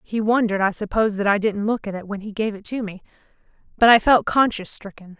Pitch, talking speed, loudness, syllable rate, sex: 210 Hz, 240 wpm, -20 LUFS, 6.5 syllables/s, female